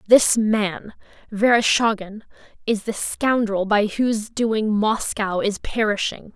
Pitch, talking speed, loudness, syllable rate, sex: 215 Hz, 115 wpm, -20 LUFS, 3.7 syllables/s, female